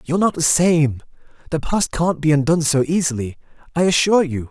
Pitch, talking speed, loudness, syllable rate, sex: 155 Hz, 185 wpm, -18 LUFS, 5.9 syllables/s, male